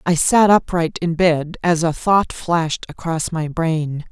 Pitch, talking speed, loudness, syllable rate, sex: 165 Hz, 175 wpm, -18 LUFS, 3.9 syllables/s, female